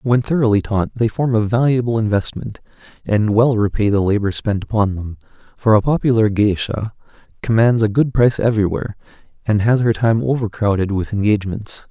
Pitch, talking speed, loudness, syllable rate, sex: 110 Hz, 160 wpm, -17 LUFS, 5.6 syllables/s, male